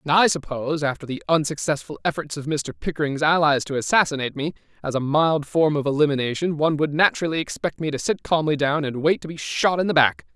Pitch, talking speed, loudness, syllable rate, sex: 145 Hz, 215 wpm, -22 LUFS, 6.3 syllables/s, male